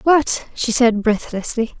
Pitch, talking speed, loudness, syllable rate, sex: 240 Hz, 135 wpm, -18 LUFS, 3.8 syllables/s, female